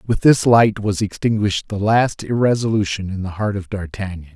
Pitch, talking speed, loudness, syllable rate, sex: 100 Hz, 180 wpm, -18 LUFS, 5.3 syllables/s, male